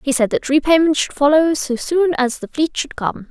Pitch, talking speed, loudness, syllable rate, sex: 290 Hz, 235 wpm, -17 LUFS, 5.0 syllables/s, female